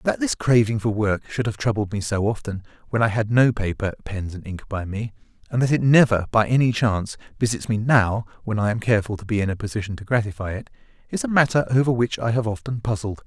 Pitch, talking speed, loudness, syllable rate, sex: 110 Hz, 235 wpm, -22 LUFS, 6.1 syllables/s, male